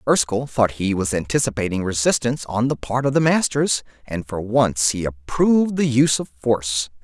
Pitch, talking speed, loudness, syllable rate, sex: 120 Hz, 180 wpm, -20 LUFS, 5.3 syllables/s, male